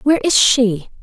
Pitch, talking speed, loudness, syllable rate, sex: 240 Hz, 175 wpm, -14 LUFS, 5.1 syllables/s, female